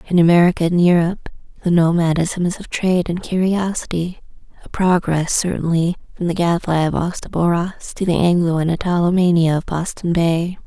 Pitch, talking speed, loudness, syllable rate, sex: 175 Hz, 165 wpm, -18 LUFS, 5.4 syllables/s, female